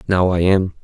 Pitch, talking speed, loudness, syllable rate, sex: 90 Hz, 215 wpm, -16 LUFS, 4.9 syllables/s, male